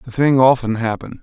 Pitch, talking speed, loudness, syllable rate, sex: 125 Hz, 195 wpm, -16 LUFS, 6.4 syllables/s, male